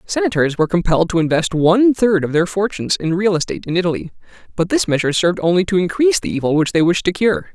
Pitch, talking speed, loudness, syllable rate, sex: 180 Hz, 230 wpm, -16 LUFS, 7.1 syllables/s, male